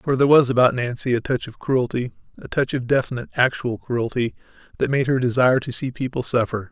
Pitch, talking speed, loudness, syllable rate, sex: 125 Hz, 195 wpm, -21 LUFS, 6.1 syllables/s, male